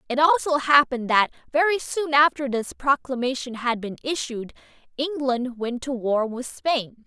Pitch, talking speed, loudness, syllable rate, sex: 265 Hz, 155 wpm, -23 LUFS, 4.5 syllables/s, female